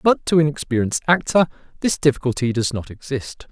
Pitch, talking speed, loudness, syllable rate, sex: 140 Hz, 170 wpm, -20 LUFS, 6.0 syllables/s, male